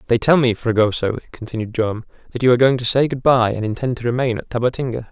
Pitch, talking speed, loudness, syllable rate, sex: 120 Hz, 235 wpm, -18 LUFS, 6.7 syllables/s, male